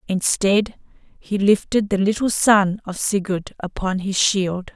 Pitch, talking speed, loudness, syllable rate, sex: 195 Hz, 140 wpm, -19 LUFS, 3.8 syllables/s, female